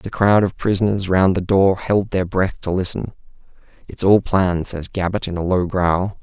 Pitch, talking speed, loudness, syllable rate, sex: 95 Hz, 200 wpm, -18 LUFS, 4.8 syllables/s, male